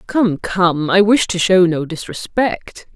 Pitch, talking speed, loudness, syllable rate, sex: 190 Hz, 160 wpm, -16 LUFS, 3.6 syllables/s, female